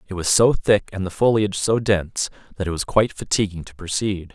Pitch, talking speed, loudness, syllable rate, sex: 95 Hz, 220 wpm, -21 LUFS, 5.9 syllables/s, male